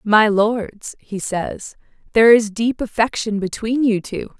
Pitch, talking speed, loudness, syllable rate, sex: 220 Hz, 150 wpm, -18 LUFS, 3.9 syllables/s, female